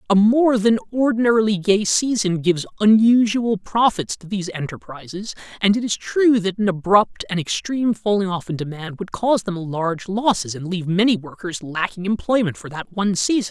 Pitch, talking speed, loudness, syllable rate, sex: 200 Hz, 180 wpm, -20 LUFS, 5.4 syllables/s, male